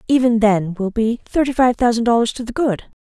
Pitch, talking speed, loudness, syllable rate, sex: 230 Hz, 215 wpm, -17 LUFS, 5.5 syllables/s, female